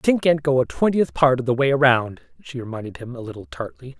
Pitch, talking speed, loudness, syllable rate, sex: 130 Hz, 240 wpm, -20 LUFS, 5.6 syllables/s, male